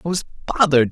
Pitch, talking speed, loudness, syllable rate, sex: 160 Hz, 195 wpm, -20 LUFS, 8.9 syllables/s, male